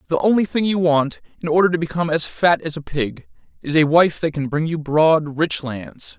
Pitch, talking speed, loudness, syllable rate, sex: 160 Hz, 235 wpm, -19 LUFS, 5.2 syllables/s, male